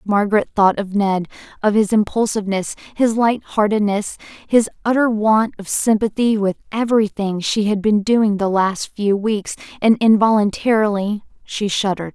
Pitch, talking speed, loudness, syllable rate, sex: 210 Hz, 145 wpm, -18 LUFS, 4.8 syllables/s, female